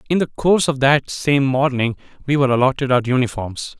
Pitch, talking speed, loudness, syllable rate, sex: 135 Hz, 190 wpm, -18 LUFS, 5.8 syllables/s, male